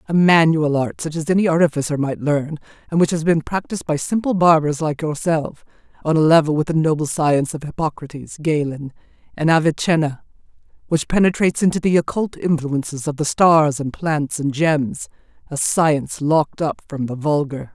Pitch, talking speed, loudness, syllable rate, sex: 155 Hz, 165 wpm, -19 LUFS, 5.3 syllables/s, female